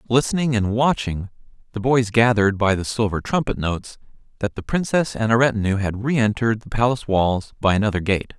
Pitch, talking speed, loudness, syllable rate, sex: 110 Hz, 180 wpm, -20 LUFS, 5.9 syllables/s, male